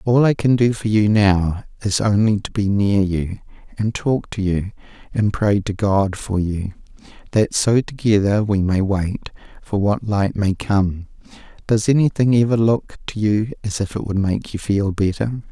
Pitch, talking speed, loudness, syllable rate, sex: 105 Hz, 180 wpm, -19 LUFS, 4.4 syllables/s, male